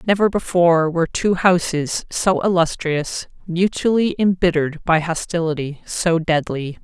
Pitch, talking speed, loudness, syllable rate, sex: 170 Hz, 115 wpm, -19 LUFS, 4.6 syllables/s, female